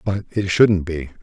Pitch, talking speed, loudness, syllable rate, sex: 90 Hz, 195 wpm, -19 LUFS, 3.9 syllables/s, male